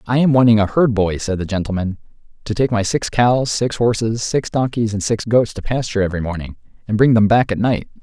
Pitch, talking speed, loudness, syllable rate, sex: 110 Hz, 230 wpm, -17 LUFS, 5.8 syllables/s, male